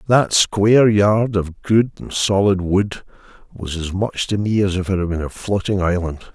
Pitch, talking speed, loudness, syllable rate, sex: 100 Hz, 200 wpm, -18 LUFS, 4.6 syllables/s, male